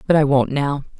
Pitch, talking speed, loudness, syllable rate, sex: 145 Hz, 240 wpm, -18 LUFS, 5.6 syllables/s, female